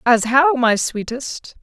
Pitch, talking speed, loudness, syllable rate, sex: 255 Hz, 150 wpm, -17 LUFS, 3.5 syllables/s, female